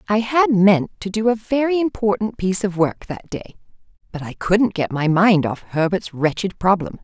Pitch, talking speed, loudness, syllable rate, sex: 200 Hz, 195 wpm, -19 LUFS, 4.8 syllables/s, female